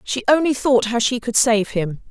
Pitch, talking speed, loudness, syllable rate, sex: 240 Hz, 230 wpm, -18 LUFS, 4.7 syllables/s, female